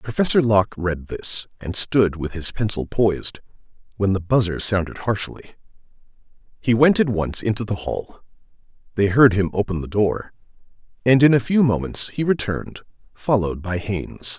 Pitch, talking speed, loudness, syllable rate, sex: 105 Hz, 160 wpm, -20 LUFS, 5.0 syllables/s, male